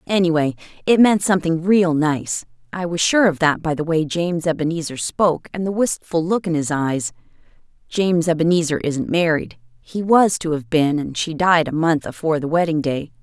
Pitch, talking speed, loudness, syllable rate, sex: 165 Hz, 190 wpm, -19 LUFS, 5.3 syllables/s, female